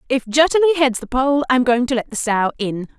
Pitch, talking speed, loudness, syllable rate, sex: 260 Hz, 240 wpm, -17 LUFS, 6.0 syllables/s, female